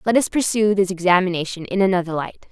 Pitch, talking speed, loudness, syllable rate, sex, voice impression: 190 Hz, 190 wpm, -19 LUFS, 6.3 syllables/s, female, very feminine, slightly young, thin, slightly tensed, slightly powerful, dark, hard, clear, fluent, slightly raspy, cute, intellectual, refreshing, sincere, very calm, very friendly, very reassuring, unique, very elegant, wild, very sweet, lively, kind, slightly intense, slightly sharp, modest, slightly light